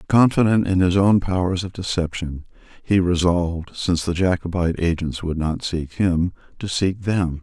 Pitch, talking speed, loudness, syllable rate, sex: 90 Hz, 160 wpm, -21 LUFS, 4.9 syllables/s, male